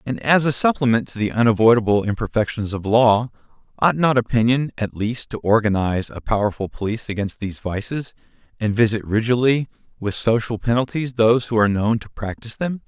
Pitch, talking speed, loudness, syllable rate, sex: 115 Hz, 170 wpm, -20 LUFS, 5.9 syllables/s, male